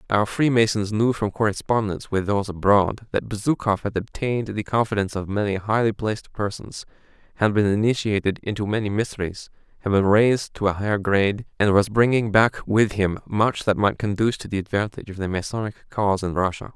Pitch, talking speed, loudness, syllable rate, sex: 105 Hz, 185 wpm, -22 LUFS, 6.0 syllables/s, male